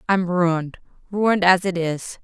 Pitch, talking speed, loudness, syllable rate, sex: 180 Hz, 135 wpm, -20 LUFS, 4.6 syllables/s, female